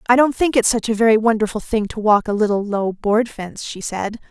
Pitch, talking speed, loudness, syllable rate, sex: 220 Hz, 250 wpm, -18 LUFS, 5.7 syllables/s, female